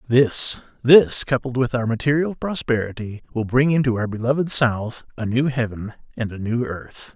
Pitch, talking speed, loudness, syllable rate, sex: 125 Hz, 170 wpm, -20 LUFS, 4.7 syllables/s, male